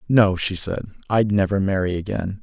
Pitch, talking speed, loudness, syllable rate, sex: 100 Hz, 175 wpm, -21 LUFS, 5.0 syllables/s, male